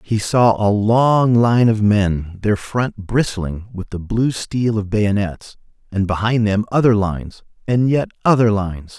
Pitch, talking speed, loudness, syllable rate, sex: 105 Hz, 165 wpm, -17 LUFS, 4.0 syllables/s, male